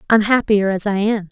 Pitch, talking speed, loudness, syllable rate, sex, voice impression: 205 Hz, 230 wpm, -16 LUFS, 5.3 syllables/s, female, very feminine, slightly young, adult-like, thin, slightly tensed, slightly powerful, bright, slightly soft, clear, fluent, slightly raspy, very cute, intellectual, very refreshing, sincere, calm, friendly, very reassuring, unique, very elegant, slightly wild, very sweet, slightly lively, very kind, modest, light